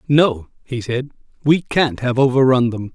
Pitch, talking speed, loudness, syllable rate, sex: 130 Hz, 185 wpm, -17 LUFS, 4.4 syllables/s, male